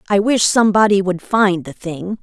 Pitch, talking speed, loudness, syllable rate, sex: 195 Hz, 190 wpm, -15 LUFS, 5.0 syllables/s, female